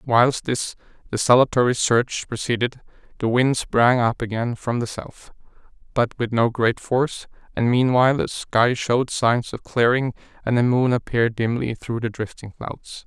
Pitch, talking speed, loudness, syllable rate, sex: 120 Hz, 160 wpm, -21 LUFS, 4.6 syllables/s, male